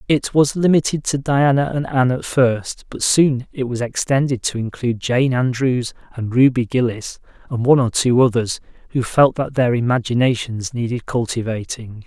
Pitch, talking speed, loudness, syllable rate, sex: 125 Hz, 165 wpm, -18 LUFS, 4.9 syllables/s, male